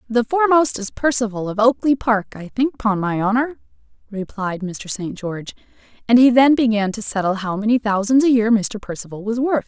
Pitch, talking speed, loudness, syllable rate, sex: 225 Hz, 190 wpm, -18 LUFS, 5.3 syllables/s, female